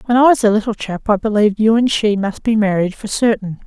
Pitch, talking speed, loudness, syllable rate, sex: 215 Hz, 260 wpm, -15 LUFS, 6.0 syllables/s, female